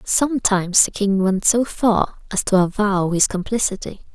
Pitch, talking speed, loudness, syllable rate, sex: 200 Hz, 160 wpm, -18 LUFS, 4.6 syllables/s, female